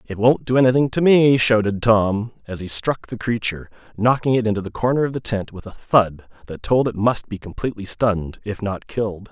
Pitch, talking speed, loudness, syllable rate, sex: 110 Hz, 220 wpm, -20 LUFS, 5.5 syllables/s, male